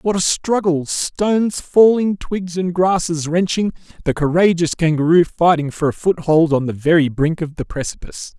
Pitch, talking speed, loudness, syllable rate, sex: 170 Hz, 165 wpm, -17 LUFS, 4.8 syllables/s, male